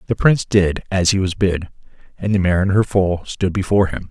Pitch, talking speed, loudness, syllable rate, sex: 95 Hz, 235 wpm, -18 LUFS, 5.6 syllables/s, male